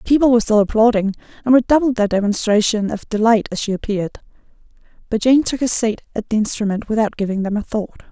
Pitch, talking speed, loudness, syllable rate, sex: 220 Hz, 190 wpm, -17 LUFS, 6.4 syllables/s, female